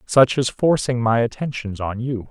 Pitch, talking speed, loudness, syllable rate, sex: 120 Hz, 180 wpm, -20 LUFS, 4.6 syllables/s, male